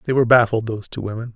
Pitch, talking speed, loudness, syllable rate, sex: 115 Hz, 265 wpm, -19 LUFS, 8.3 syllables/s, male